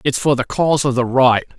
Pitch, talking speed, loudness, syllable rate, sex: 130 Hz, 265 wpm, -16 LUFS, 5.9 syllables/s, male